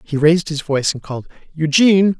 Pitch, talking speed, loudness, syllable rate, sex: 160 Hz, 190 wpm, -16 LUFS, 6.6 syllables/s, male